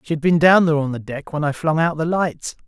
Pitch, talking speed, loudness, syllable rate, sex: 155 Hz, 315 wpm, -18 LUFS, 6.0 syllables/s, male